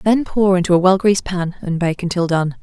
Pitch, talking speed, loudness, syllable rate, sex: 185 Hz, 250 wpm, -17 LUFS, 5.6 syllables/s, female